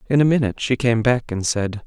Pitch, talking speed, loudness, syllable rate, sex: 120 Hz, 255 wpm, -19 LUFS, 5.8 syllables/s, male